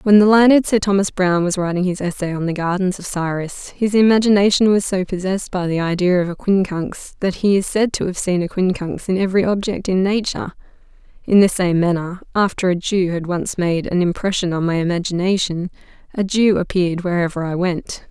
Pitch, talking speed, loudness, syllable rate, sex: 185 Hz, 200 wpm, -18 LUFS, 5.7 syllables/s, female